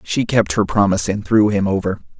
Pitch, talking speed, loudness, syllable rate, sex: 100 Hz, 220 wpm, -17 LUFS, 5.7 syllables/s, male